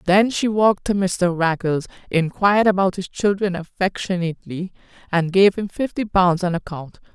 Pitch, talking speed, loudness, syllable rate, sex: 185 Hz, 150 wpm, -20 LUFS, 4.9 syllables/s, female